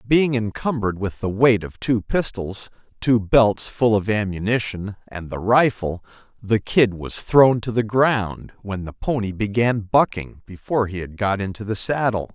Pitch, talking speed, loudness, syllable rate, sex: 110 Hz, 170 wpm, -21 LUFS, 4.4 syllables/s, male